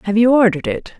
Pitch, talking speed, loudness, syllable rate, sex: 215 Hz, 240 wpm, -15 LUFS, 7.5 syllables/s, female